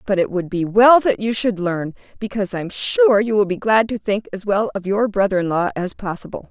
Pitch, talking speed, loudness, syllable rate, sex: 200 Hz, 250 wpm, -18 LUFS, 5.3 syllables/s, female